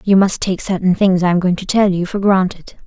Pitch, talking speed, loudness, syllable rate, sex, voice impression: 190 Hz, 275 wpm, -15 LUFS, 5.6 syllables/s, female, feminine, slightly young, relaxed, slightly weak, soft, muffled, fluent, raspy, slightly cute, calm, slightly friendly, unique, slightly lively, sharp